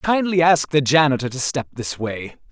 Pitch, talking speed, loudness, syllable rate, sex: 145 Hz, 190 wpm, -19 LUFS, 4.7 syllables/s, male